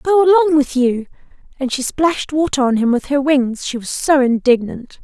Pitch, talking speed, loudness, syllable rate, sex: 275 Hz, 205 wpm, -16 LUFS, 5.2 syllables/s, female